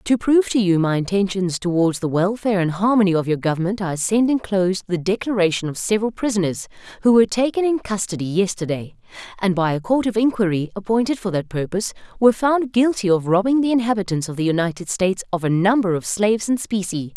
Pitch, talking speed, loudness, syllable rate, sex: 200 Hz, 195 wpm, -20 LUFS, 6.3 syllables/s, female